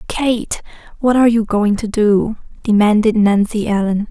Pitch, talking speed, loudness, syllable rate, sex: 215 Hz, 145 wpm, -15 LUFS, 4.5 syllables/s, female